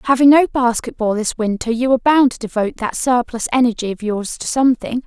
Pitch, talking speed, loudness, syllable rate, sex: 240 Hz, 200 wpm, -17 LUFS, 6.0 syllables/s, female